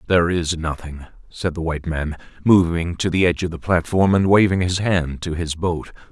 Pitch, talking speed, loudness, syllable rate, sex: 85 Hz, 205 wpm, -20 LUFS, 5.3 syllables/s, male